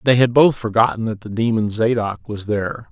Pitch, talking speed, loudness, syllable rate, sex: 110 Hz, 205 wpm, -18 LUFS, 5.5 syllables/s, male